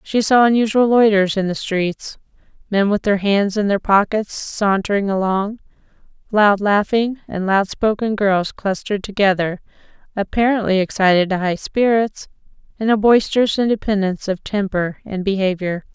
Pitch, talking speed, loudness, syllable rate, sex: 205 Hz, 140 wpm, -18 LUFS, 4.9 syllables/s, female